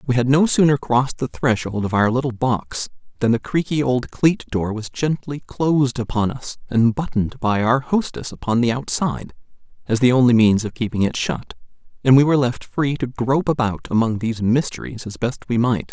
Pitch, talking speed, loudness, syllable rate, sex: 125 Hz, 200 wpm, -20 LUFS, 5.3 syllables/s, male